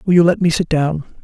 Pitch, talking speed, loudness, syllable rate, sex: 165 Hz, 290 wpm, -16 LUFS, 6.2 syllables/s, male